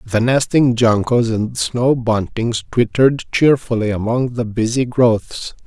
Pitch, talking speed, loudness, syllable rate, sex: 120 Hz, 125 wpm, -16 LUFS, 4.0 syllables/s, male